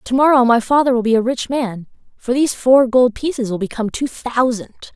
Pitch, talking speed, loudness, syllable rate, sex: 245 Hz, 205 wpm, -16 LUFS, 5.7 syllables/s, female